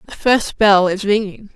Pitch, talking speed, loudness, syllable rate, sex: 205 Hz, 190 wpm, -15 LUFS, 4.3 syllables/s, female